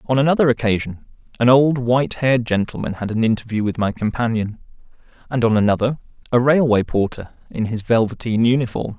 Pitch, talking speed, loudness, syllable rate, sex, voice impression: 115 Hz, 160 wpm, -19 LUFS, 6.0 syllables/s, male, masculine, adult-like, tensed, powerful, bright, clear, fluent, intellectual, sincere, calm, friendly, slightly wild, lively, slightly kind